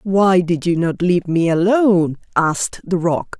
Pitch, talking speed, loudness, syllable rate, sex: 180 Hz, 175 wpm, -17 LUFS, 4.5 syllables/s, female